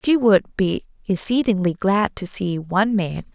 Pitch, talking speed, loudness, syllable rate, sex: 200 Hz, 160 wpm, -20 LUFS, 4.4 syllables/s, female